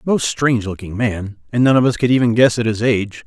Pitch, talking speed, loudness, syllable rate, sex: 115 Hz, 255 wpm, -16 LUFS, 5.9 syllables/s, male